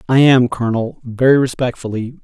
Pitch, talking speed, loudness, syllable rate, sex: 125 Hz, 135 wpm, -15 LUFS, 5.6 syllables/s, male